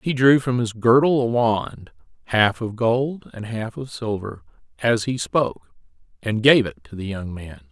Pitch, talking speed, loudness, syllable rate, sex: 115 Hz, 185 wpm, -21 LUFS, 4.4 syllables/s, male